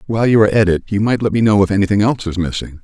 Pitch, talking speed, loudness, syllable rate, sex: 105 Hz, 315 wpm, -15 LUFS, 8.0 syllables/s, male